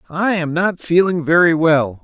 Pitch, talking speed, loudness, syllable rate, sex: 165 Hz, 175 wpm, -15 LUFS, 4.4 syllables/s, male